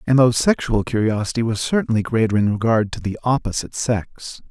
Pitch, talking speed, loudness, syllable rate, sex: 115 Hz, 175 wpm, -20 LUFS, 5.7 syllables/s, male